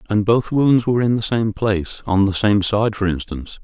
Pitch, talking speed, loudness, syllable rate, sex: 105 Hz, 215 wpm, -18 LUFS, 5.3 syllables/s, male